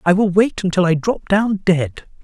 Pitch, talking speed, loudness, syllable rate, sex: 185 Hz, 215 wpm, -17 LUFS, 4.4 syllables/s, male